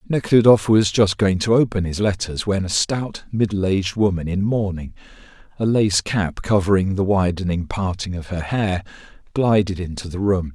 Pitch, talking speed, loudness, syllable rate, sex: 100 Hz, 170 wpm, -20 LUFS, 4.9 syllables/s, male